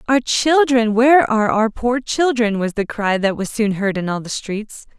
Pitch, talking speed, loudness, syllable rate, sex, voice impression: 225 Hz, 215 wpm, -17 LUFS, 4.7 syllables/s, female, very feminine, adult-like, slightly middle-aged, very thin, tensed, slightly powerful, bright, slightly soft, very clear, fluent, cool, very intellectual, refreshing, sincere, calm, very friendly, very reassuring, unique, elegant, slightly wild, slightly sweet, very lively, slightly strict, slightly intense